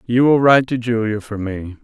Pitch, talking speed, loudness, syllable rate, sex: 115 Hz, 230 wpm, -17 LUFS, 5.3 syllables/s, male